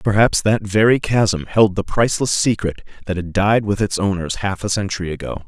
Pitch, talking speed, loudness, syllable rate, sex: 100 Hz, 195 wpm, -18 LUFS, 5.4 syllables/s, male